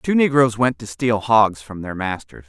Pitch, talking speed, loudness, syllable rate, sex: 110 Hz, 220 wpm, -19 LUFS, 4.5 syllables/s, male